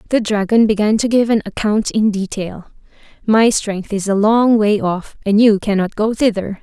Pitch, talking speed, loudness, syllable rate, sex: 210 Hz, 190 wpm, -15 LUFS, 4.7 syllables/s, female